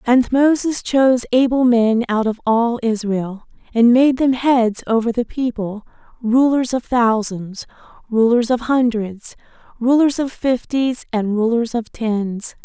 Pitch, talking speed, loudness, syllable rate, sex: 235 Hz, 140 wpm, -17 LUFS, 3.9 syllables/s, female